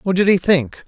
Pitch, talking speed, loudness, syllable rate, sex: 175 Hz, 275 wpm, -16 LUFS, 4.8 syllables/s, male